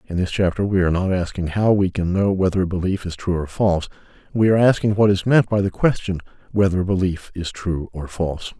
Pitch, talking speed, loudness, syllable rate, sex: 95 Hz, 235 wpm, -20 LUFS, 6.1 syllables/s, male